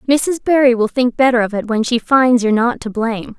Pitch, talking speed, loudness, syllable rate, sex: 240 Hz, 250 wpm, -15 LUFS, 5.6 syllables/s, female